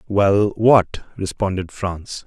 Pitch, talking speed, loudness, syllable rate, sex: 100 Hz, 80 wpm, -19 LUFS, 3.0 syllables/s, male